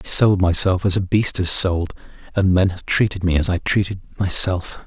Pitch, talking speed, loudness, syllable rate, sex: 95 Hz, 210 wpm, -18 LUFS, 5.0 syllables/s, male